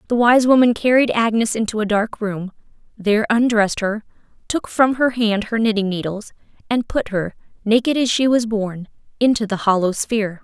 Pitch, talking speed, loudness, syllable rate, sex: 220 Hz, 180 wpm, -18 LUFS, 5.3 syllables/s, female